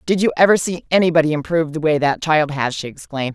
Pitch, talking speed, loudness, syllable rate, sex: 160 Hz, 235 wpm, -17 LUFS, 6.6 syllables/s, female